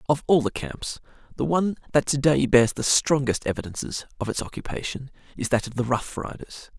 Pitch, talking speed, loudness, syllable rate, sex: 135 Hz, 195 wpm, -24 LUFS, 5.6 syllables/s, male